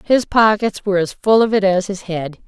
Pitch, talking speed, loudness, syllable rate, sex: 200 Hz, 245 wpm, -16 LUFS, 5.2 syllables/s, female